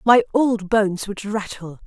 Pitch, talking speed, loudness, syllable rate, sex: 205 Hz, 160 wpm, -20 LUFS, 4.4 syllables/s, female